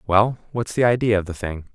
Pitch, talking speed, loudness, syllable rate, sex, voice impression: 105 Hz, 240 wpm, -21 LUFS, 5.6 syllables/s, male, masculine, adult-like, slightly middle-aged, thick, slightly tensed, slightly weak, slightly dark, slightly soft, slightly clear, fluent, cool, intellectual, refreshing, very sincere, very calm, mature, very friendly, very reassuring, slightly unique, elegant, sweet, slightly lively, very kind, modest